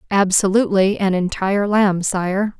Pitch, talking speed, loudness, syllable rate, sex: 195 Hz, 115 wpm, -17 LUFS, 4.6 syllables/s, female